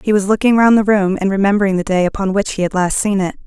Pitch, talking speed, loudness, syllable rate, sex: 200 Hz, 295 wpm, -15 LUFS, 6.7 syllables/s, female